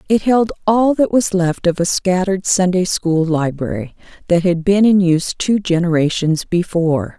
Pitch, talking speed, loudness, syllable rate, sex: 180 Hz, 165 wpm, -16 LUFS, 4.7 syllables/s, female